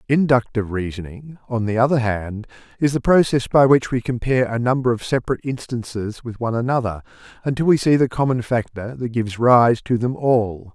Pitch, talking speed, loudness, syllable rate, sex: 120 Hz, 185 wpm, -19 LUFS, 5.7 syllables/s, male